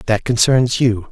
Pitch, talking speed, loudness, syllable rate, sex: 115 Hz, 160 wpm, -15 LUFS, 4.2 syllables/s, male